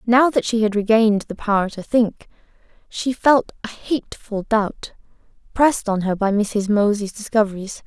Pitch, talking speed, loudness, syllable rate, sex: 215 Hz, 160 wpm, -19 LUFS, 4.8 syllables/s, female